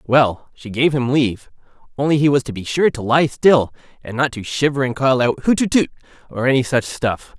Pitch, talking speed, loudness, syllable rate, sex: 135 Hz, 210 wpm, -18 LUFS, 5.3 syllables/s, male